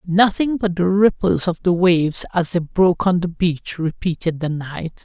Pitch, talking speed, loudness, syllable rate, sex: 175 Hz, 190 wpm, -19 LUFS, 4.6 syllables/s, female